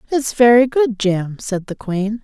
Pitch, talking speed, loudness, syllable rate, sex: 220 Hz, 190 wpm, -16 LUFS, 4.1 syllables/s, female